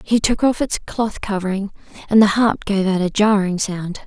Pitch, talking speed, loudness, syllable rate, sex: 205 Hz, 205 wpm, -18 LUFS, 4.8 syllables/s, female